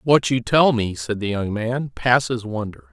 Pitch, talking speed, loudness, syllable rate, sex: 120 Hz, 205 wpm, -20 LUFS, 4.4 syllables/s, male